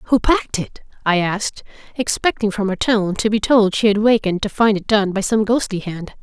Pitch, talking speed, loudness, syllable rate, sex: 210 Hz, 220 wpm, -18 LUFS, 5.4 syllables/s, female